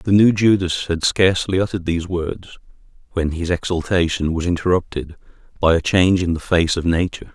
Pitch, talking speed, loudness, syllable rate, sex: 90 Hz, 170 wpm, -19 LUFS, 5.7 syllables/s, male